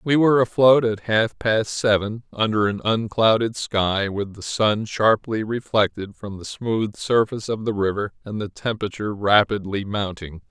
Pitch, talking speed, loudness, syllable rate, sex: 110 Hz, 160 wpm, -21 LUFS, 4.6 syllables/s, male